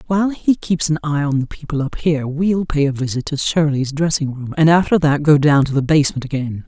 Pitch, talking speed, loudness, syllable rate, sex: 150 Hz, 245 wpm, -17 LUFS, 5.8 syllables/s, female